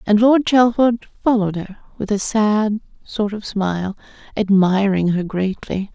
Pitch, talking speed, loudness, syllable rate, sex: 205 Hz, 140 wpm, -18 LUFS, 4.4 syllables/s, female